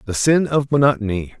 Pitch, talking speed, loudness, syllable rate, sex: 125 Hz, 170 wpm, -17 LUFS, 5.7 syllables/s, male